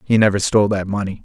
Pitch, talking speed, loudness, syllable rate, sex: 100 Hz, 240 wpm, -17 LUFS, 7.1 syllables/s, male